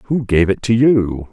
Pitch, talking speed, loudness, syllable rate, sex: 110 Hz, 225 wpm, -15 LUFS, 3.9 syllables/s, male